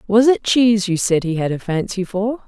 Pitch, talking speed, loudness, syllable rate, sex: 205 Hz, 245 wpm, -17 LUFS, 5.3 syllables/s, female